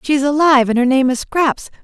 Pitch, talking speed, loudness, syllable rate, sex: 275 Hz, 230 wpm, -14 LUFS, 5.5 syllables/s, female